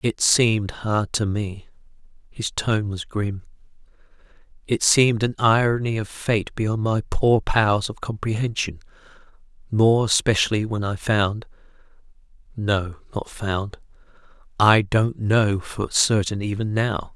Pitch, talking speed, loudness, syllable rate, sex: 105 Hz, 120 wpm, -22 LUFS, 4.0 syllables/s, male